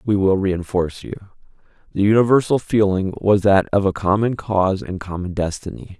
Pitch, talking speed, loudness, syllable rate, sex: 100 Hz, 160 wpm, -19 LUFS, 5.4 syllables/s, male